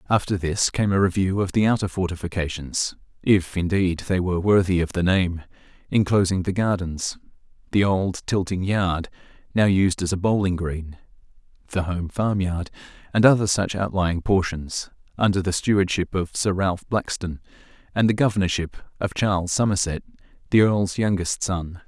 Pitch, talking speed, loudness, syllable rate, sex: 95 Hz, 145 wpm, -23 LUFS, 5.0 syllables/s, male